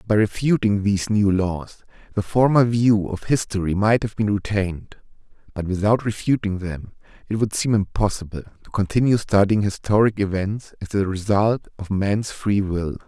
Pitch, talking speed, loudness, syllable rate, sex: 105 Hz, 155 wpm, -21 LUFS, 4.8 syllables/s, male